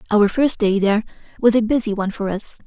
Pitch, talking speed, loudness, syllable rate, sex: 215 Hz, 225 wpm, -19 LUFS, 6.4 syllables/s, female